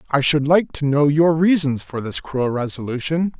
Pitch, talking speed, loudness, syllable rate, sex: 150 Hz, 195 wpm, -18 LUFS, 4.7 syllables/s, male